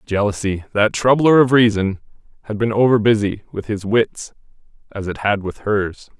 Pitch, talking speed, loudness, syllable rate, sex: 105 Hz, 165 wpm, -18 LUFS, 4.8 syllables/s, male